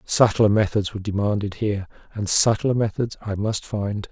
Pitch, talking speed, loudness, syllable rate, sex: 105 Hz, 160 wpm, -22 LUFS, 5.1 syllables/s, male